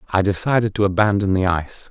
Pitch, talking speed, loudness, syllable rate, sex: 100 Hz, 190 wpm, -19 LUFS, 6.3 syllables/s, male